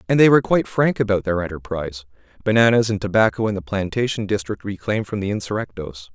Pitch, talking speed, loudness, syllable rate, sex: 105 Hz, 175 wpm, -20 LUFS, 6.6 syllables/s, male